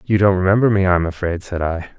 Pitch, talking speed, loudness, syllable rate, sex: 95 Hz, 270 wpm, -17 LUFS, 6.6 syllables/s, male